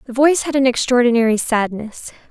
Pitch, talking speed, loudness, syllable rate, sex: 245 Hz, 155 wpm, -16 LUFS, 6.0 syllables/s, female